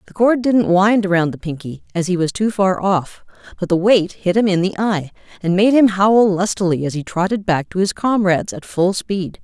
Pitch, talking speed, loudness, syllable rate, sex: 190 Hz, 230 wpm, -17 LUFS, 5.1 syllables/s, female